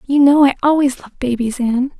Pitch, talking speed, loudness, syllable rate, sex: 265 Hz, 210 wpm, -15 LUFS, 6.3 syllables/s, female